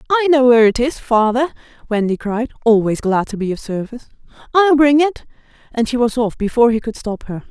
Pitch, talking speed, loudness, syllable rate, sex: 240 Hz, 210 wpm, -16 LUFS, 6.0 syllables/s, female